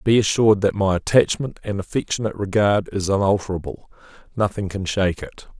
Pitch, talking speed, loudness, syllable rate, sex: 100 Hz, 150 wpm, -20 LUFS, 6.0 syllables/s, male